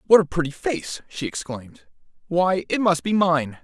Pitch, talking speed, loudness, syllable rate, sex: 170 Hz, 180 wpm, -22 LUFS, 4.7 syllables/s, male